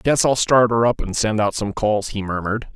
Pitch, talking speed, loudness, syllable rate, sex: 110 Hz, 260 wpm, -19 LUFS, 5.4 syllables/s, male